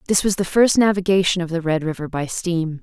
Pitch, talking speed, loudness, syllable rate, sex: 175 Hz, 235 wpm, -19 LUFS, 5.7 syllables/s, female